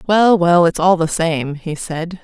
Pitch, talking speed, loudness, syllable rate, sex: 170 Hz, 215 wpm, -15 LUFS, 3.9 syllables/s, female